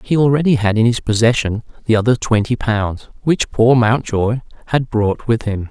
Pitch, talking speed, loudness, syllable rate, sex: 115 Hz, 180 wpm, -16 LUFS, 4.9 syllables/s, male